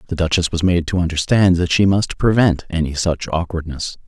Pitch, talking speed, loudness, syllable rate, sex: 85 Hz, 190 wpm, -17 LUFS, 5.3 syllables/s, male